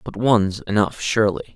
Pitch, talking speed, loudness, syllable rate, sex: 105 Hz, 155 wpm, -20 LUFS, 5.7 syllables/s, male